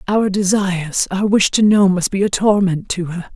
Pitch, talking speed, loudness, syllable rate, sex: 190 Hz, 215 wpm, -16 LUFS, 4.8 syllables/s, female